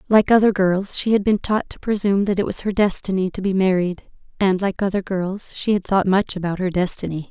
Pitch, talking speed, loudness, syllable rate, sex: 195 Hz, 230 wpm, -20 LUFS, 5.6 syllables/s, female